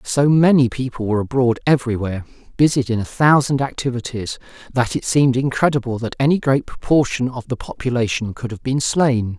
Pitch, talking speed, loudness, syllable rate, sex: 125 Hz, 165 wpm, -18 LUFS, 5.7 syllables/s, male